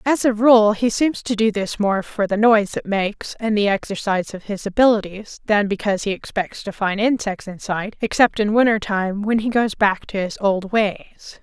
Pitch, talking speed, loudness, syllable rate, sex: 210 Hz, 210 wpm, -19 LUFS, 5.0 syllables/s, female